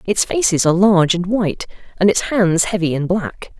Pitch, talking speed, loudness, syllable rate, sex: 185 Hz, 200 wpm, -16 LUFS, 5.4 syllables/s, female